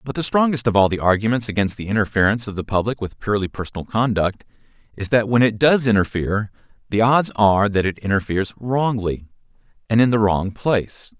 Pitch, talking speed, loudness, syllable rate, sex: 110 Hz, 190 wpm, -19 LUFS, 6.1 syllables/s, male